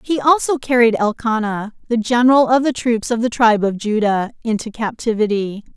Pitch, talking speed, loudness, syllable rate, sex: 230 Hz, 165 wpm, -17 LUFS, 5.3 syllables/s, female